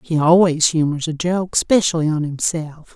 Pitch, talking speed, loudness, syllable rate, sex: 165 Hz, 140 wpm, -17 LUFS, 4.9 syllables/s, female